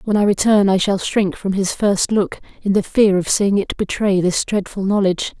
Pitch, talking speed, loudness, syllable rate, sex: 200 Hz, 220 wpm, -17 LUFS, 4.9 syllables/s, female